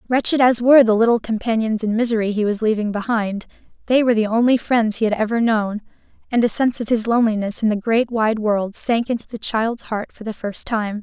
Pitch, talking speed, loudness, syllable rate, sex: 225 Hz, 225 wpm, -19 LUFS, 5.8 syllables/s, female